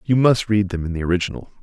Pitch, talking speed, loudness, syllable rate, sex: 100 Hz, 260 wpm, -20 LUFS, 6.9 syllables/s, male